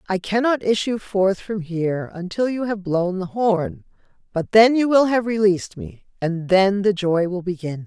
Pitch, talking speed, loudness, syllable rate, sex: 195 Hz, 190 wpm, -20 LUFS, 4.5 syllables/s, female